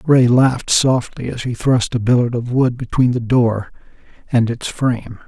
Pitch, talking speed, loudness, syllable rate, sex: 120 Hz, 180 wpm, -17 LUFS, 4.6 syllables/s, male